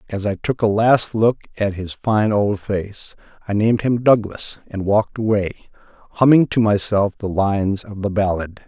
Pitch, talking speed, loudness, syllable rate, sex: 105 Hz, 180 wpm, -19 LUFS, 4.7 syllables/s, male